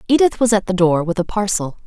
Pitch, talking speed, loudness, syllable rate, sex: 195 Hz, 255 wpm, -17 LUFS, 6.1 syllables/s, female